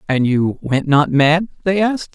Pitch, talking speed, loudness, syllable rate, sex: 160 Hz, 195 wpm, -16 LUFS, 4.5 syllables/s, male